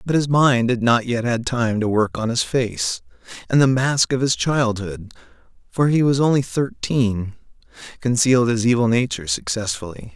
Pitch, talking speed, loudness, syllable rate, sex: 120 Hz, 160 wpm, -19 LUFS, 4.8 syllables/s, male